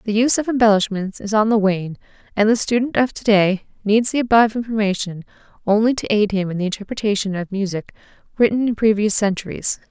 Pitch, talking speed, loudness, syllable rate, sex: 210 Hz, 190 wpm, -18 LUFS, 6.1 syllables/s, female